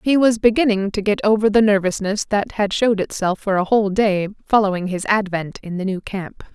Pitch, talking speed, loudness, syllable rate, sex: 205 Hz, 210 wpm, -19 LUFS, 5.3 syllables/s, female